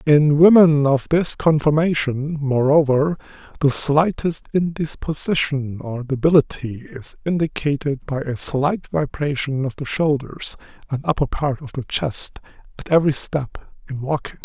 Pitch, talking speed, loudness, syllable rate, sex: 145 Hz, 130 wpm, -19 LUFS, 4.4 syllables/s, male